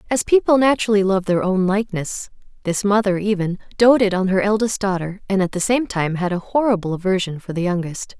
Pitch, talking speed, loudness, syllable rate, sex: 200 Hz, 200 wpm, -19 LUFS, 5.8 syllables/s, female